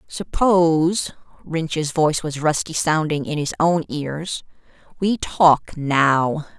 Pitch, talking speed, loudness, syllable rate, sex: 160 Hz, 120 wpm, -20 LUFS, 3.4 syllables/s, female